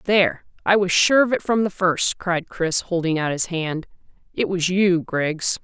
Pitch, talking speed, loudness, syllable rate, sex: 180 Hz, 200 wpm, -20 LUFS, 4.3 syllables/s, female